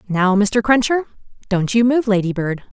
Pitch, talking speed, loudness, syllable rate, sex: 215 Hz, 130 wpm, -17 LUFS, 4.7 syllables/s, female